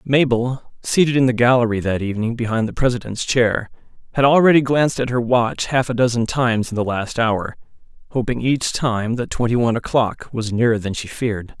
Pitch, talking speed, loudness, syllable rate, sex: 120 Hz, 190 wpm, -19 LUFS, 5.5 syllables/s, male